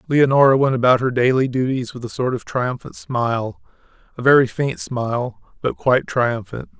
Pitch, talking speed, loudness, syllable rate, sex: 125 Hz, 160 wpm, -19 LUFS, 5.2 syllables/s, male